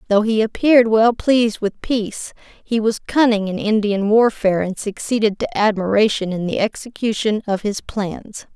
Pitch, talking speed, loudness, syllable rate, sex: 215 Hz, 160 wpm, -18 LUFS, 4.8 syllables/s, female